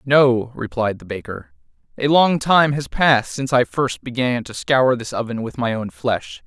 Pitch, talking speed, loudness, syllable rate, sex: 130 Hz, 195 wpm, -19 LUFS, 4.6 syllables/s, male